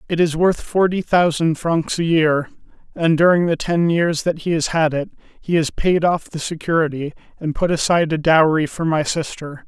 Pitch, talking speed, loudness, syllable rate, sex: 160 Hz, 200 wpm, -18 LUFS, 5.0 syllables/s, male